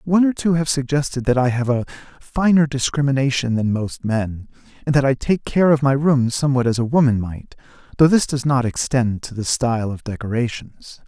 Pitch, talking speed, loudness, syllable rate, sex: 130 Hz, 200 wpm, -19 LUFS, 5.4 syllables/s, male